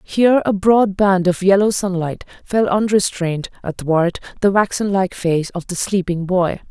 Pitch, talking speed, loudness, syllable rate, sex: 190 Hz, 160 wpm, -17 LUFS, 4.5 syllables/s, female